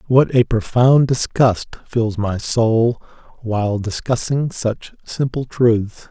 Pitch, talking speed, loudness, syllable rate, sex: 115 Hz, 120 wpm, -18 LUFS, 3.4 syllables/s, male